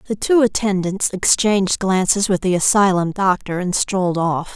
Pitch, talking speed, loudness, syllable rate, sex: 190 Hz, 160 wpm, -17 LUFS, 4.8 syllables/s, female